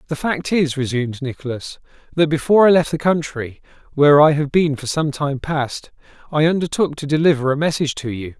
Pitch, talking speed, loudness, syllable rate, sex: 145 Hz, 195 wpm, -18 LUFS, 5.8 syllables/s, male